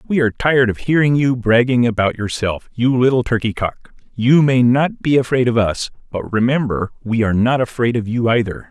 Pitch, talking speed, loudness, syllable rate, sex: 120 Hz, 200 wpm, -16 LUFS, 5.5 syllables/s, male